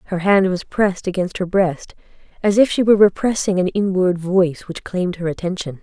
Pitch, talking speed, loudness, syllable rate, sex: 185 Hz, 195 wpm, -18 LUFS, 5.7 syllables/s, female